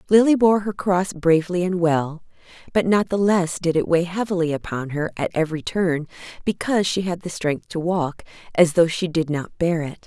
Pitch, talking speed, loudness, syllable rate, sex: 175 Hz, 205 wpm, -21 LUFS, 5.0 syllables/s, female